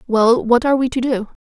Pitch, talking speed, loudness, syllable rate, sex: 240 Hz, 250 wpm, -16 LUFS, 5.9 syllables/s, female